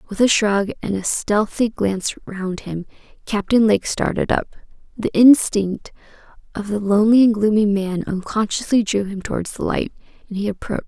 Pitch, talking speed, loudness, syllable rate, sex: 210 Hz, 165 wpm, -19 LUFS, 5.2 syllables/s, female